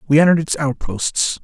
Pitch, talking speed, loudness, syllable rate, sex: 145 Hz, 165 wpm, -17 LUFS, 5.6 syllables/s, male